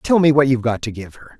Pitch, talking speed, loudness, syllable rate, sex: 130 Hz, 345 wpm, -16 LUFS, 6.7 syllables/s, male